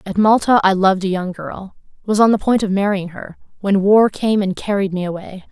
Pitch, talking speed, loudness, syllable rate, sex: 200 Hz, 230 wpm, -16 LUFS, 5.4 syllables/s, female